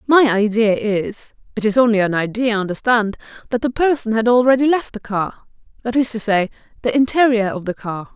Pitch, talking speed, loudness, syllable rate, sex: 225 Hz, 170 wpm, -18 LUFS, 5.3 syllables/s, female